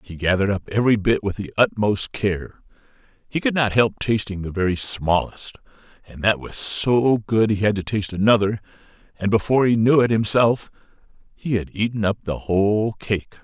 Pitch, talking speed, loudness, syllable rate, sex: 105 Hz, 180 wpm, -21 LUFS, 5.3 syllables/s, male